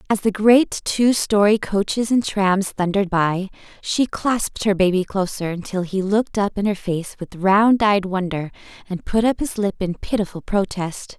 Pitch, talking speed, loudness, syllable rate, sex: 200 Hz, 180 wpm, -20 LUFS, 4.6 syllables/s, female